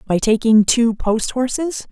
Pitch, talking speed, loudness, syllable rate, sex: 235 Hz, 155 wpm, -17 LUFS, 4.0 syllables/s, female